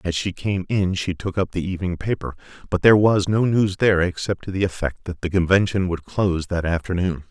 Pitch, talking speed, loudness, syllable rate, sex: 90 Hz, 220 wpm, -21 LUFS, 5.7 syllables/s, male